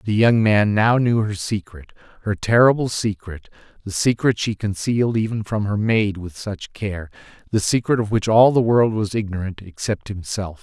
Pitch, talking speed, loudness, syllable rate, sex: 105 Hz, 175 wpm, -20 LUFS, 4.8 syllables/s, male